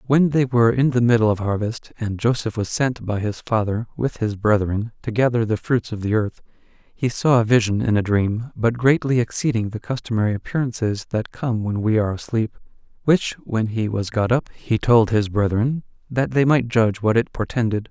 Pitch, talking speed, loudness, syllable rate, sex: 115 Hz, 205 wpm, -21 LUFS, 5.2 syllables/s, male